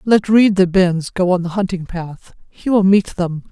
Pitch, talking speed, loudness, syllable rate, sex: 185 Hz, 220 wpm, -16 LUFS, 4.3 syllables/s, female